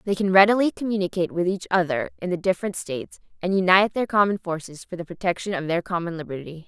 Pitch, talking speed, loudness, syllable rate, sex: 185 Hz, 205 wpm, -23 LUFS, 6.8 syllables/s, female